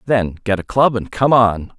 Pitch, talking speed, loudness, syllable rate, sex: 110 Hz, 235 wpm, -16 LUFS, 4.6 syllables/s, male